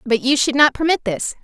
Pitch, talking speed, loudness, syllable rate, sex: 265 Hz, 250 wpm, -16 LUFS, 5.5 syllables/s, female